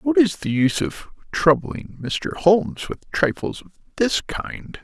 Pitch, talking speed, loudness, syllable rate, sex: 175 Hz, 160 wpm, -21 LUFS, 4.2 syllables/s, male